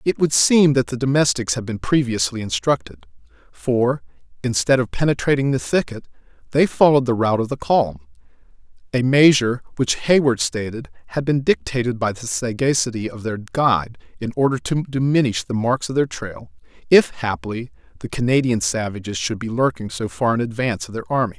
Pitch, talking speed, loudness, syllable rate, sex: 120 Hz, 170 wpm, -20 LUFS, 5.5 syllables/s, male